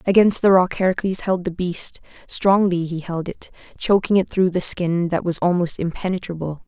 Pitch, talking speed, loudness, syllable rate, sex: 180 Hz, 180 wpm, -20 LUFS, 5.0 syllables/s, female